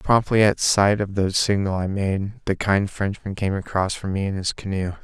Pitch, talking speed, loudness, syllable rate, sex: 100 Hz, 215 wpm, -22 LUFS, 4.6 syllables/s, male